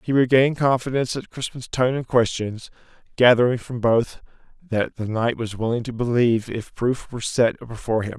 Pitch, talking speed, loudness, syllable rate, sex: 120 Hz, 175 wpm, -22 LUFS, 5.5 syllables/s, male